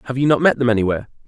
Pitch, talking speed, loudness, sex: 125 Hz, 285 wpm, -17 LUFS, male